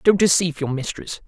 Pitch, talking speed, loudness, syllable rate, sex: 160 Hz, 190 wpm, -20 LUFS, 5.8 syllables/s, male